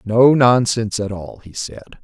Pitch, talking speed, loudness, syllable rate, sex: 110 Hz, 175 wpm, -16 LUFS, 4.7 syllables/s, male